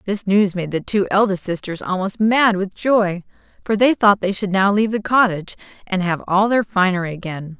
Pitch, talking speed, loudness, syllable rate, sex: 195 Hz, 205 wpm, -18 LUFS, 5.3 syllables/s, female